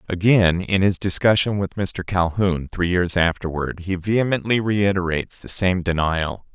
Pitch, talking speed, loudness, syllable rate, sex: 95 Hz, 145 wpm, -20 LUFS, 4.6 syllables/s, male